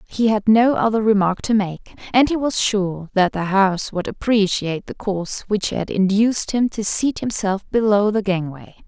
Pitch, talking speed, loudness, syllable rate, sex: 205 Hz, 190 wpm, -19 LUFS, 4.8 syllables/s, female